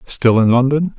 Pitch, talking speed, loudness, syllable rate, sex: 130 Hz, 180 wpm, -14 LUFS, 4.7 syllables/s, male